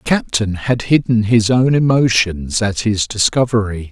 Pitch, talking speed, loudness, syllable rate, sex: 110 Hz, 155 wpm, -15 LUFS, 4.5 syllables/s, male